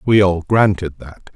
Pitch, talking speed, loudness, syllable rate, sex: 95 Hz, 180 wpm, -15 LUFS, 4.5 syllables/s, male